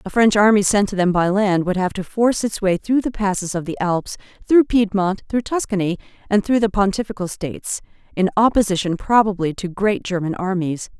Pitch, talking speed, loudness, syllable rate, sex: 200 Hz, 195 wpm, -19 LUFS, 5.4 syllables/s, female